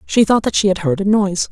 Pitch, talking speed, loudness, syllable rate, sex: 195 Hz, 315 wpm, -15 LUFS, 6.6 syllables/s, female